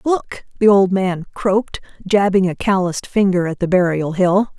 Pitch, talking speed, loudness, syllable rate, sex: 190 Hz, 170 wpm, -17 LUFS, 4.8 syllables/s, female